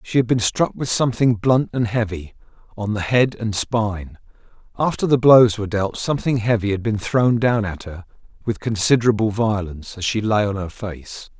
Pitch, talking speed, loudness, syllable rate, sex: 110 Hz, 190 wpm, -19 LUFS, 5.2 syllables/s, male